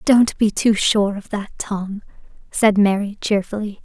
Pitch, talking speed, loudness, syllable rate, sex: 205 Hz, 155 wpm, -19 LUFS, 4.1 syllables/s, female